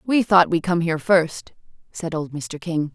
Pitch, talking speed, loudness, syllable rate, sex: 170 Hz, 205 wpm, -21 LUFS, 4.5 syllables/s, female